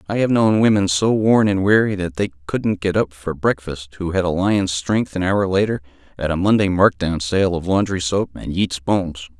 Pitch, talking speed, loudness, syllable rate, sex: 95 Hz, 225 wpm, -19 LUFS, 4.9 syllables/s, male